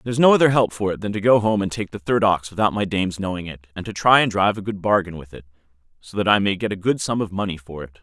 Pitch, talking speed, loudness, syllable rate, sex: 100 Hz, 315 wpm, -20 LUFS, 6.9 syllables/s, male